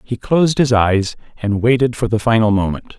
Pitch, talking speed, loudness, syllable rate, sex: 115 Hz, 200 wpm, -16 LUFS, 5.3 syllables/s, male